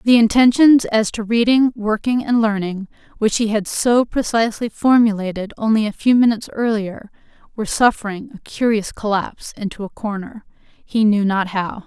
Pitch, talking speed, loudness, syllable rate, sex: 220 Hz, 155 wpm, -17 LUFS, 5.1 syllables/s, female